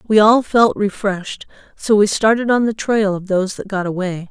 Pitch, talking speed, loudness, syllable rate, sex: 205 Hz, 210 wpm, -16 LUFS, 5.1 syllables/s, female